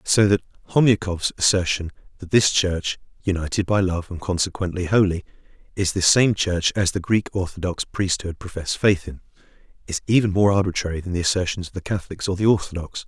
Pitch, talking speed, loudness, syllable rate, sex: 95 Hz, 175 wpm, -21 LUFS, 5.7 syllables/s, male